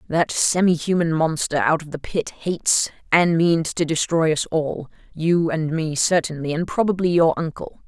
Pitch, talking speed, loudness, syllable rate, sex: 165 Hz, 170 wpm, -20 LUFS, 4.6 syllables/s, female